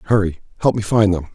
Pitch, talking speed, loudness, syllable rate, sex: 100 Hz, 225 wpm, -18 LUFS, 7.1 syllables/s, male